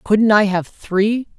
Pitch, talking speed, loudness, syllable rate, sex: 205 Hz, 175 wpm, -16 LUFS, 3.3 syllables/s, female